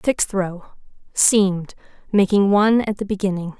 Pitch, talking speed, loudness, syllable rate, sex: 195 Hz, 115 wpm, -19 LUFS, 4.8 syllables/s, female